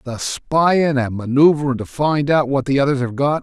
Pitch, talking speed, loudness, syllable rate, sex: 135 Hz, 210 wpm, -17 LUFS, 4.5 syllables/s, male